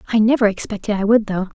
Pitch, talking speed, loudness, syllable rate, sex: 215 Hz, 230 wpm, -18 LUFS, 7.2 syllables/s, female